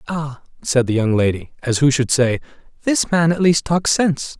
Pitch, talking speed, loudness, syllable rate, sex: 145 Hz, 205 wpm, -18 LUFS, 4.8 syllables/s, male